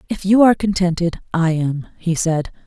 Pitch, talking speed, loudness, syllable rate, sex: 175 Hz, 180 wpm, -18 LUFS, 5.1 syllables/s, female